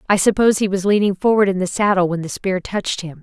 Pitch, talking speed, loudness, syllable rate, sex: 195 Hz, 260 wpm, -18 LUFS, 6.6 syllables/s, female